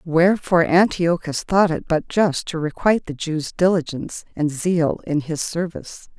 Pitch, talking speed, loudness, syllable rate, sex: 165 Hz, 155 wpm, -20 LUFS, 4.8 syllables/s, female